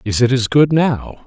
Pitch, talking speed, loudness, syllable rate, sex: 130 Hz, 235 wpm, -15 LUFS, 4.3 syllables/s, male